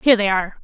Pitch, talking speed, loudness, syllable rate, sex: 205 Hz, 285 wpm, -17 LUFS, 8.9 syllables/s, female